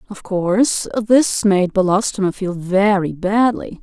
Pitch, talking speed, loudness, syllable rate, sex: 200 Hz, 125 wpm, -17 LUFS, 3.9 syllables/s, female